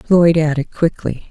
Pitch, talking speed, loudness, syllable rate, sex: 155 Hz, 140 wpm, -16 LUFS, 4.4 syllables/s, female